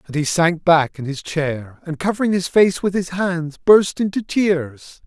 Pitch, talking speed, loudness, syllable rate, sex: 170 Hz, 200 wpm, -18 LUFS, 4.2 syllables/s, male